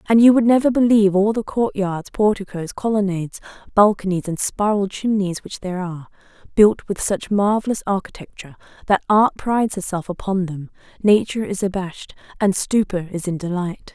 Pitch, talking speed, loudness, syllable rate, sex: 195 Hz, 150 wpm, -19 LUFS, 5.5 syllables/s, female